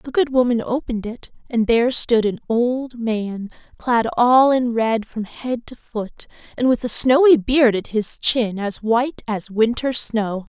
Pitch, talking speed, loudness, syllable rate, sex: 235 Hz, 180 wpm, -19 LUFS, 4.1 syllables/s, female